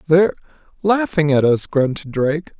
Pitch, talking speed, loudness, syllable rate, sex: 155 Hz, 115 wpm, -18 LUFS, 5.7 syllables/s, male